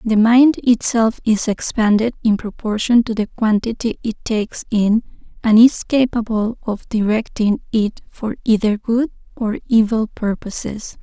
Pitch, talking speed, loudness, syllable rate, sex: 220 Hz, 135 wpm, -17 LUFS, 4.3 syllables/s, female